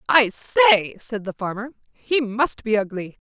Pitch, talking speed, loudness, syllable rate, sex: 235 Hz, 165 wpm, -20 LUFS, 4.6 syllables/s, female